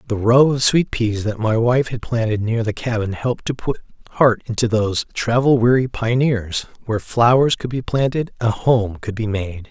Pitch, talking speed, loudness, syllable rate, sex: 115 Hz, 200 wpm, -18 LUFS, 4.9 syllables/s, male